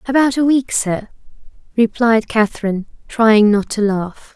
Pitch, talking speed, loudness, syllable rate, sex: 225 Hz, 140 wpm, -16 LUFS, 4.5 syllables/s, female